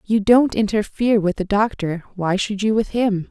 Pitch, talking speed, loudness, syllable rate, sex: 205 Hz, 180 wpm, -19 LUFS, 4.9 syllables/s, female